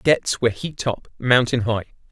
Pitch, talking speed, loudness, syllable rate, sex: 115 Hz, 170 wpm, -21 LUFS, 5.1 syllables/s, male